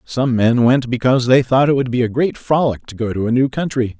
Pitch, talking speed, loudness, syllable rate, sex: 125 Hz, 270 wpm, -16 LUFS, 5.7 syllables/s, male